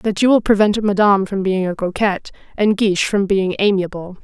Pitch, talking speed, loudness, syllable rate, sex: 200 Hz, 200 wpm, -17 LUFS, 5.7 syllables/s, female